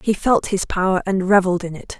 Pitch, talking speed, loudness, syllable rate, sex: 190 Hz, 240 wpm, -18 LUFS, 6.0 syllables/s, female